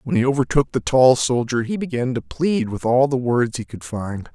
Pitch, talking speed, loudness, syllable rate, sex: 125 Hz, 235 wpm, -20 LUFS, 5.0 syllables/s, male